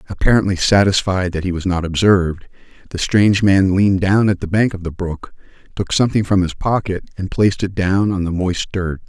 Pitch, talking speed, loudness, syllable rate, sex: 95 Hz, 205 wpm, -17 LUFS, 5.6 syllables/s, male